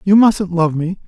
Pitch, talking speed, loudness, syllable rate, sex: 180 Hz, 225 wpm, -15 LUFS, 4.4 syllables/s, male